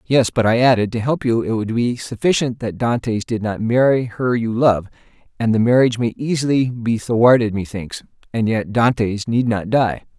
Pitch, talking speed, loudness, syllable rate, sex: 115 Hz, 195 wpm, -18 LUFS, 4.9 syllables/s, male